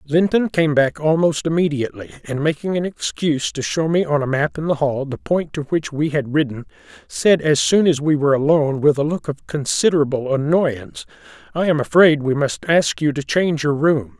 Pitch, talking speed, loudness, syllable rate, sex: 150 Hz, 205 wpm, -18 LUFS, 5.4 syllables/s, male